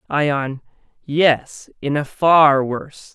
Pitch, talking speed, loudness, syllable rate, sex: 145 Hz, 115 wpm, -18 LUFS, 2.9 syllables/s, male